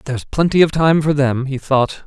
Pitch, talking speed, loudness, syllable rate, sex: 145 Hz, 230 wpm, -16 LUFS, 5.2 syllables/s, male